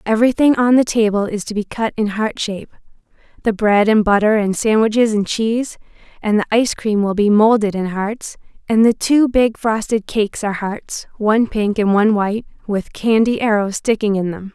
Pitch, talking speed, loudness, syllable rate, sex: 215 Hz, 190 wpm, -16 LUFS, 5.3 syllables/s, female